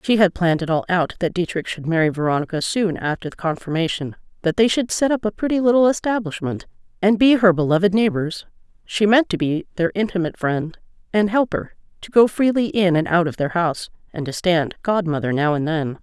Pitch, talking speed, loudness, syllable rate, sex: 185 Hz, 205 wpm, -20 LUFS, 5.8 syllables/s, female